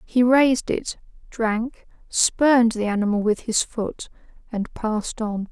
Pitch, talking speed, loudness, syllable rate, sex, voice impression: 230 Hz, 140 wpm, -22 LUFS, 4.1 syllables/s, female, very feminine, slightly young, adult-like, very thin, slightly tensed, weak, very bright, soft, very clear, fluent, very cute, intellectual, very refreshing, sincere, very calm, very friendly, very reassuring, very unique, very elegant, slightly wild, very sweet, lively, very kind, slightly intense, slightly sharp, modest, very light